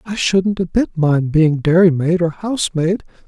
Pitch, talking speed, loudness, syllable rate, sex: 175 Hz, 165 wpm, -16 LUFS, 4.4 syllables/s, male